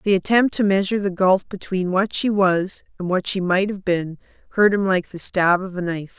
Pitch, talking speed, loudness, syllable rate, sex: 190 Hz, 235 wpm, -20 LUFS, 5.2 syllables/s, female